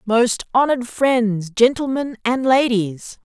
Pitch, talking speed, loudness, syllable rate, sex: 240 Hz, 110 wpm, -18 LUFS, 3.7 syllables/s, female